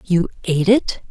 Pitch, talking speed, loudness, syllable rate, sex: 185 Hz, 160 wpm, -18 LUFS, 4.9 syllables/s, female